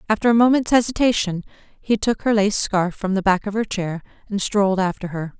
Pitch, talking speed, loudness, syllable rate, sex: 205 Hz, 210 wpm, -20 LUFS, 5.5 syllables/s, female